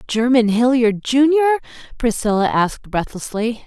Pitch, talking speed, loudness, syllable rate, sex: 240 Hz, 100 wpm, -17 LUFS, 4.8 syllables/s, female